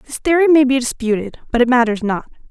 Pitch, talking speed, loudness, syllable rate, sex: 250 Hz, 215 wpm, -16 LUFS, 6.0 syllables/s, female